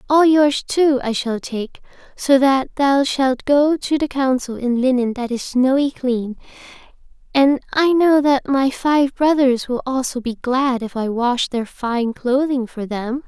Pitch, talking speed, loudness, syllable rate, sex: 260 Hz, 175 wpm, -18 LUFS, 3.9 syllables/s, female